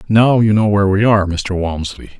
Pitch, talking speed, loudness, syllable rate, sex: 100 Hz, 220 wpm, -14 LUFS, 5.7 syllables/s, male